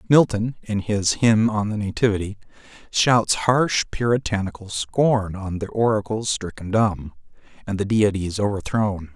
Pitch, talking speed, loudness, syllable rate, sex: 105 Hz, 130 wpm, -21 LUFS, 4.3 syllables/s, male